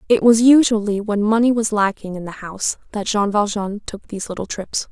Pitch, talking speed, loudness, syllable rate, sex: 210 Hz, 210 wpm, -18 LUFS, 5.5 syllables/s, female